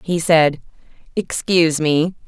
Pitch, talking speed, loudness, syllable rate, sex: 165 Hz, 105 wpm, -17 LUFS, 4.0 syllables/s, female